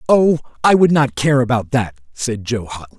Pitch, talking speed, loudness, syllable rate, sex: 125 Hz, 200 wpm, -16 LUFS, 5.0 syllables/s, male